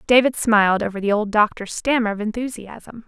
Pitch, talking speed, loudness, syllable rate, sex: 220 Hz, 175 wpm, -19 LUFS, 5.5 syllables/s, female